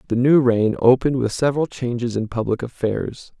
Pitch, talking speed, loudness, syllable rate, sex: 125 Hz, 175 wpm, -19 LUFS, 5.5 syllables/s, male